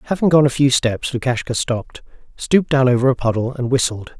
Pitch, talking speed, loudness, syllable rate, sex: 130 Hz, 200 wpm, -17 LUFS, 6.0 syllables/s, male